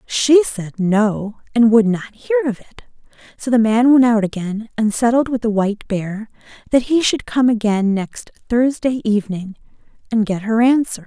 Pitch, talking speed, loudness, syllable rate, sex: 225 Hz, 180 wpm, -17 LUFS, 4.6 syllables/s, female